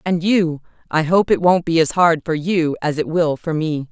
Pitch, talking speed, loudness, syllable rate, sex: 165 Hz, 230 wpm, -18 LUFS, 4.7 syllables/s, female